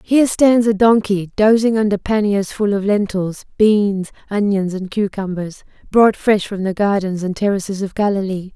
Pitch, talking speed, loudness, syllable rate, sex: 200 Hz, 160 wpm, -17 LUFS, 4.8 syllables/s, female